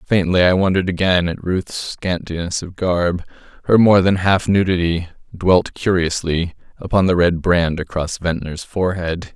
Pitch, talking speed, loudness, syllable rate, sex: 90 Hz, 150 wpm, -18 LUFS, 4.6 syllables/s, male